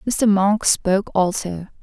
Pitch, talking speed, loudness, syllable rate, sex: 200 Hz, 130 wpm, -18 LUFS, 4.1 syllables/s, female